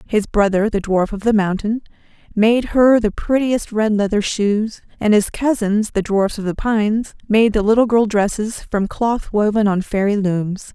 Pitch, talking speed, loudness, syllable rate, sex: 210 Hz, 185 wpm, -17 LUFS, 4.4 syllables/s, female